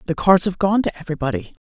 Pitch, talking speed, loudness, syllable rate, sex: 175 Hz, 215 wpm, -19 LUFS, 7.4 syllables/s, female